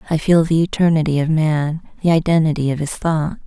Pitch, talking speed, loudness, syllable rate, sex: 155 Hz, 190 wpm, -17 LUFS, 5.7 syllables/s, female